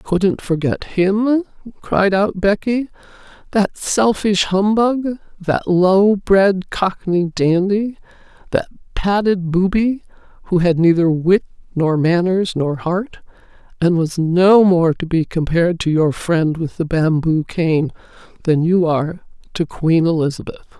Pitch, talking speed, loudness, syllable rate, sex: 180 Hz, 130 wpm, -17 LUFS, 3.8 syllables/s, female